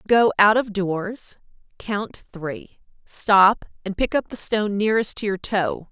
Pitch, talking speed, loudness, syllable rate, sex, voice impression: 205 Hz, 160 wpm, -21 LUFS, 3.9 syllables/s, female, very feminine, adult-like, slightly middle-aged, thin, tensed, powerful, bright, slightly hard, clear, fluent, slightly raspy, slightly cute, cool, slightly intellectual, refreshing, slightly sincere, calm, slightly friendly, reassuring, very unique, elegant, slightly wild, lively, strict, slightly intense, sharp, slightly light